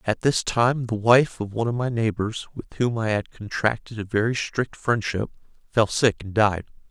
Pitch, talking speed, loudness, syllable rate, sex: 115 Hz, 200 wpm, -23 LUFS, 4.9 syllables/s, male